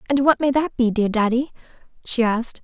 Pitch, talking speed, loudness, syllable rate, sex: 250 Hz, 205 wpm, -20 LUFS, 5.8 syllables/s, female